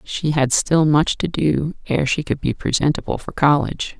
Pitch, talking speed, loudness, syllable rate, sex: 145 Hz, 195 wpm, -19 LUFS, 4.8 syllables/s, female